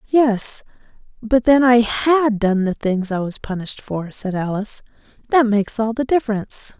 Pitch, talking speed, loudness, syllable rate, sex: 225 Hz, 170 wpm, -19 LUFS, 4.9 syllables/s, female